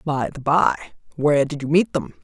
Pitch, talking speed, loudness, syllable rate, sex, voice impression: 140 Hz, 215 wpm, -20 LUFS, 5.5 syllables/s, female, feminine, adult-like, tensed, powerful, bright, clear, intellectual, friendly, lively, intense